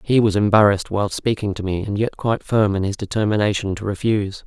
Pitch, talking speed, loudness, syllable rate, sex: 105 Hz, 215 wpm, -20 LUFS, 6.2 syllables/s, male